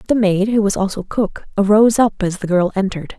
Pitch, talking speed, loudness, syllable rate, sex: 200 Hz, 190 wpm, -16 LUFS, 6.0 syllables/s, female